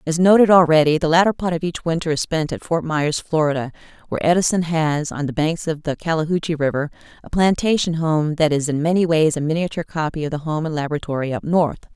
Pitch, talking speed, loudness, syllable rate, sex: 160 Hz, 215 wpm, -19 LUFS, 6.2 syllables/s, female